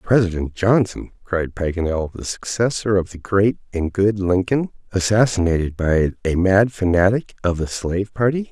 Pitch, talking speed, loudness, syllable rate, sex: 95 Hz, 150 wpm, -20 LUFS, 4.8 syllables/s, male